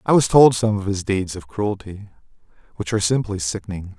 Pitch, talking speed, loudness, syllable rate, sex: 100 Hz, 195 wpm, -20 LUFS, 5.6 syllables/s, male